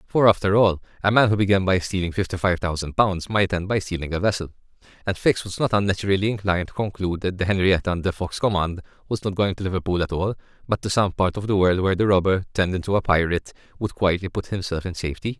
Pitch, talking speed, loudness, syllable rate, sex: 95 Hz, 235 wpm, -22 LUFS, 6.7 syllables/s, male